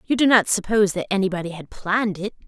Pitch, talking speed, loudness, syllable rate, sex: 200 Hz, 220 wpm, -20 LUFS, 6.7 syllables/s, female